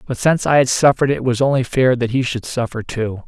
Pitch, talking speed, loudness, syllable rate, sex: 125 Hz, 255 wpm, -17 LUFS, 6.1 syllables/s, male